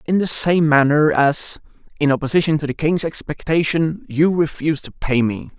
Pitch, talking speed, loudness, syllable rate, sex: 150 Hz, 170 wpm, -18 LUFS, 5.0 syllables/s, male